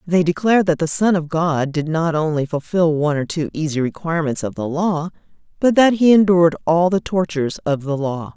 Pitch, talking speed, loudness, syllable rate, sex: 165 Hz, 210 wpm, -18 LUFS, 5.5 syllables/s, female